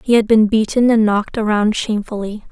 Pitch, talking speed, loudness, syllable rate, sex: 215 Hz, 190 wpm, -16 LUFS, 5.8 syllables/s, female